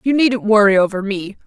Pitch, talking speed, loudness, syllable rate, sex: 210 Hz, 205 wpm, -15 LUFS, 5.4 syllables/s, female